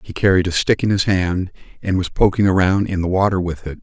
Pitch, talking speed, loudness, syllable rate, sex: 95 Hz, 250 wpm, -18 LUFS, 5.8 syllables/s, male